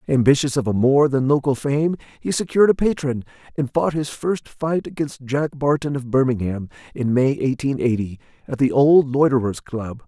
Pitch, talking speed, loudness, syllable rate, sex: 135 Hz, 180 wpm, -20 LUFS, 5.0 syllables/s, male